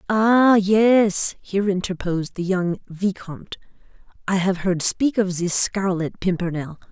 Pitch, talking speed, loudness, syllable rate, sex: 190 Hz, 130 wpm, -20 LUFS, 4.1 syllables/s, female